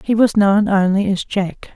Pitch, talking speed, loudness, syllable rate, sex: 200 Hz, 205 wpm, -16 LUFS, 4.4 syllables/s, female